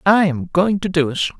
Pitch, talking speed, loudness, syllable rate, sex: 175 Hz, 260 wpm, -18 LUFS, 5.4 syllables/s, male